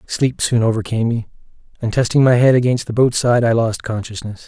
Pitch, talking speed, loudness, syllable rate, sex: 115 Hz, 200 wpm, -17 LUFS, 5.8 syllables/s, male